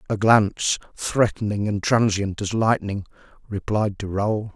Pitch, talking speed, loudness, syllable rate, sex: 105 Hz, 130 wpm, -22 LUFS, 4.2 syllables/s, male